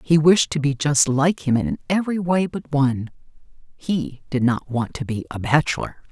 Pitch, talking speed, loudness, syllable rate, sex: 140 Hz, 195 wpm, -21 LUFS, 4.9 syllables/s, female